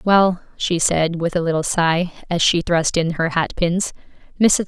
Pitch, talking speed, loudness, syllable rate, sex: 170 Hz, 195 wpm, -19 LUFS, 3.5 syllables/s, female